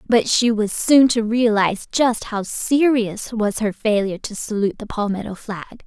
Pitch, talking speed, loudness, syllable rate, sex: 220 Hz, 175 wpm, -19 LUFS, 4.5 syllables/s, female